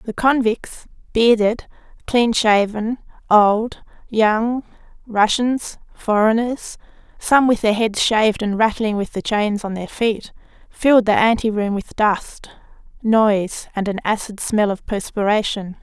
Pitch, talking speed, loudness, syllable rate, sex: 220 Hz, 130 wpm, -18 LUFS, 4.0 syllables/s, female